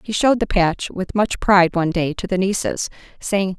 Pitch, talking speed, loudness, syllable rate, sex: 190 Hz, 220 wpm, -19 LUFS, 5.5 syllables/s, female